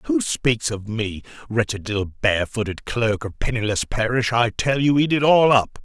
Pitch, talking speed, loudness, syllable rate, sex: 115 Hz, 185 wpm, -21 LUFS, 4.7 syllables/s, male